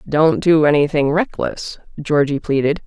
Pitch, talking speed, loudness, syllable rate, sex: 150 Hz, 125 wpm, -16 LUFS, 4.3 syllables/s, female